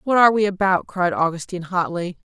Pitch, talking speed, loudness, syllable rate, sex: 185 Hz, 180 wpm, -20 LUFS, 6.2 syllables/s, female